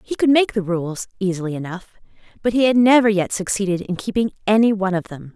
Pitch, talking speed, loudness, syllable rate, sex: 200 Hz, 215 wpm, -19 LUFS, 6.2 syllables/s, female